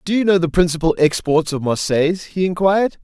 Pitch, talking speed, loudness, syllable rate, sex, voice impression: 170 Hz, 200 wpm, -17 LUFS, 5.8 syllables/s, male, masculine, very adult-like, slightly thick, slightly fluent, slightly cool, sincere, slightly lively